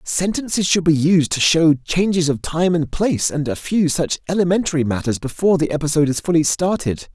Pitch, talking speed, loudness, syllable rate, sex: 160 Hz, 195 wpm, -18 LUFS, 5.7 syllables/s, male